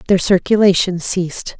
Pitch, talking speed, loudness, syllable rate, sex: 185 Hz, 115 wpm, -15 LUFS, 5.7 syllables/s, female